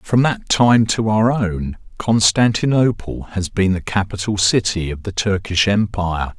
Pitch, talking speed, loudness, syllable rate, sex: 105 Hz, 150 wpm, -17 LUFS, 4.2 syllables/s, male